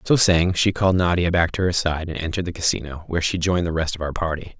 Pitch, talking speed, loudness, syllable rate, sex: 85 Hz, 275 wpm, -21 LUFS, 6.8 syllables/s, male